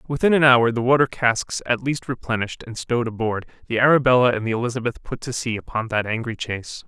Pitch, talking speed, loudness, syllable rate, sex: 120 Hz, 210 wpm, -21 LUFS, 6.1 syllables/s, male